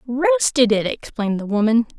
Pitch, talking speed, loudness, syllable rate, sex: 215 Hz, 150 wpm, -19 LUFS, 5.1 syllables/s, female